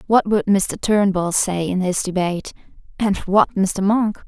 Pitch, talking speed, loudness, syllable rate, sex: 195 Hz, 155 wpm, -19 LUFS, 4.1 syllables/s, female